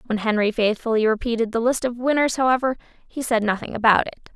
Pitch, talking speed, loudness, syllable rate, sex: 235 Hz, 195 wpm, -21 LUFS, 6.5 syllables/s, female